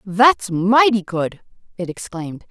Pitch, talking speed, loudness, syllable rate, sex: 200 Hz, 120 wpm, -18 LUFS, 3.9 syllables/s, female